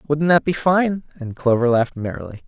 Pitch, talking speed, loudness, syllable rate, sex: 140 Hz, 195 wpm, -19 LUFS, 5.3 syllables/s, male